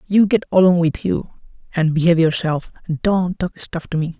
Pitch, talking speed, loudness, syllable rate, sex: 170 Hz, 200 wpm, -18 LUFS, 5.2 syllables/s, male